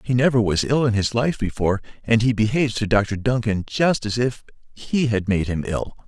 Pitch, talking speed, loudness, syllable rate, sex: 115 Hz, 215 wpm, -21 LUFS, 5.3 syllables/s, male